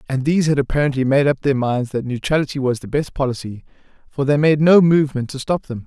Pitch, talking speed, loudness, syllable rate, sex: 140 Hz, 225 wpm, -18 LUFS, 6.3 syllables/s, male